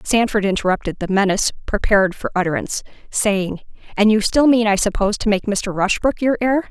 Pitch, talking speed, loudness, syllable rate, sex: 210 Hz, 180 wpm, -18 LUFS, 5.9 syllables/s, female